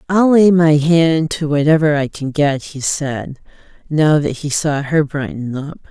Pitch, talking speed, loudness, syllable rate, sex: 150 Hz, 185 wpm, -15 LUFS, 4.0 syllables/s, female